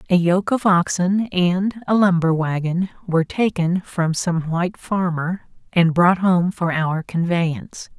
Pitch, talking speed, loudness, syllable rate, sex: 180 Hz, 150 wpm, -19 LUFS, 4.0 syllables/s, female